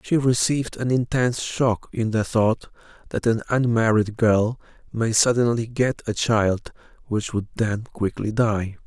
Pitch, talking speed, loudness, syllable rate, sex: 115 Hz, 150 wpm, -22 LUFS, 4.2 syllables/s, male